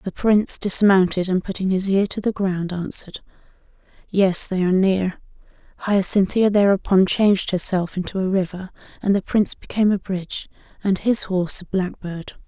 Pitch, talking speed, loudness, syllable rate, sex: 190 Hz, 160 wpm, -20 LUFS, 5.3 syllables/s, female